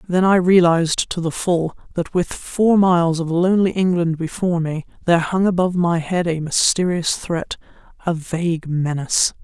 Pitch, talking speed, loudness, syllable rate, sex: 170 Hz, 160 wpm, -18 LUFS, 5.1 syllables/s, female